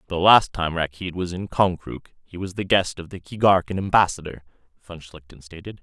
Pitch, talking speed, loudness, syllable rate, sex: 90 Hz, 185 wpm, -21 LUFS, 5.2 syllables/s, male